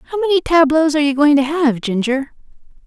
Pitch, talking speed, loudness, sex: 295 Hz, 190 wpm, -15 LUFS, female